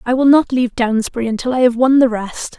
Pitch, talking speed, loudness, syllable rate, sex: 245 Hz, 255 wpm, -15 LUFS, 6.1 syllables/s, female